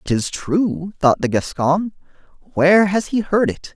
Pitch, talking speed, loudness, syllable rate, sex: 170 Hz, 160 wpm, -18 LUFS, 4.1 syllables/s, male